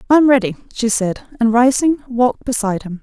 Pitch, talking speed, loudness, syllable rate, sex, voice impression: 240 Hz, 200 wpm, -16 LUFS, 6.0 syllables/s, female, feminine, slightly adult-like, intellectual, friendly, slightly elegant, slightly sweet